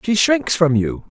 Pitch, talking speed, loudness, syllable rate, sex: 170 Hz, 205 wpm, -17 LUFS, 4.1 syllables/s, male